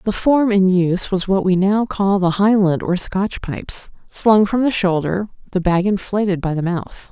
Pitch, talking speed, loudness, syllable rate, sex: 195 Hz, 195 wpm, -17 LUFS, 4.6 syllables/s, female